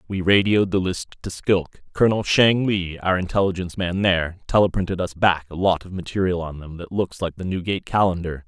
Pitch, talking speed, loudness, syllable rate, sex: 90 Hz, 200 wpm, -21 LUFS, 5.7 syllables/s, male